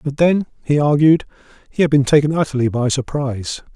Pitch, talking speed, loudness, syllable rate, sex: 145 Hz, 175 wpm, -17 LUFS, 5.8 syllables/s, male